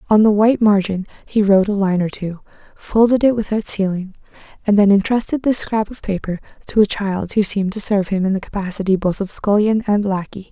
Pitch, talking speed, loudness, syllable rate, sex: 200 Hz, 210 wpm, -17 LUFS, 5.9 syllables/s, female